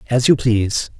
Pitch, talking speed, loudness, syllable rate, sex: 115 Hz, 180 wpm, -16 LUFS, 5.4 syllables/s, male